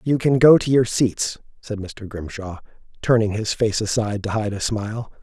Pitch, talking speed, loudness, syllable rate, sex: 110 Hz, 195 wpm, -20 LUFS, 4.9 syllables/s, male